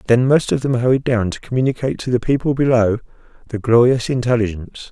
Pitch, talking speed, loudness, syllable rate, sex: 120 Hz, 185 wpm, -17 LUFS, 6.4 syllables/s, male